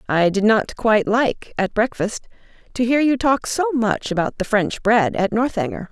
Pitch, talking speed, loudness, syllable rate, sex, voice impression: 225 Hz, 195 wpm, -19 LUFS, 4.6 syllables/s, female, very feminine, slightly adult-like, thin, tensed, slightly powerful, bright, soft, clear, fluent, slightly raspy, cute, intellectual, refreshing, slightly sincere, calm, friendly, slightly reassuring, unique, elegant, wild, sweet, lively, slightly strict, intense, slightly sharp, light